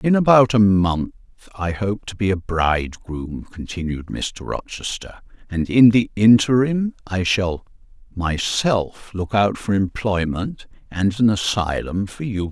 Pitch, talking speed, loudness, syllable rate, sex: 100 Hz, 140 wpm, -20 LUFS, 3.9 syllables/s, male